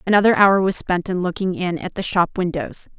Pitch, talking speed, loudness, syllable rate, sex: 185 Hz, 220 wpm, -19 LUFS, 5.3 syllables/s, female